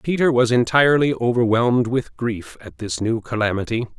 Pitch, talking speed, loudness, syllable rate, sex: 120 Hz, 150 wpm, -19 LUFS, 5.3 syllables/s, male